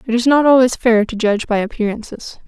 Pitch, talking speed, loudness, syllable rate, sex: 230 Hz, 220 wpm, -15 LUFS, 6.1 syllables/s, female